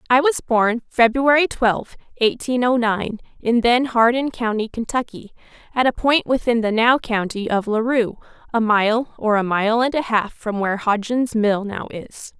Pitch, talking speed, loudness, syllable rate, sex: 230 Hz, 175 wpm, -19 LUFS, 4.4 syllables/s, female